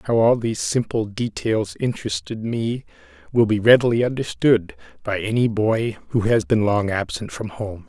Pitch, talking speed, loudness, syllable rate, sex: 110 Hz, 160 wpm, -21 LUFS, 4.7 syllables/s, male